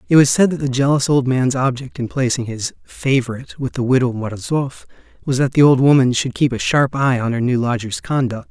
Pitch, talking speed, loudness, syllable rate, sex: 130 Hz, 225 wpm, -17 LUFS, 5.6 syllables/s, male